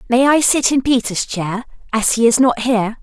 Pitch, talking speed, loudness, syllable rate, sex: 240 Hz, 220 wpm, -15 LUFS, 5.1 syllables/s, female